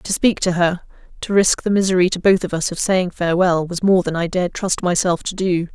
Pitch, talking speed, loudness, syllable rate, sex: 185 Hz, 250 wpm, -18 LUFS, 5.6 syllables/s, female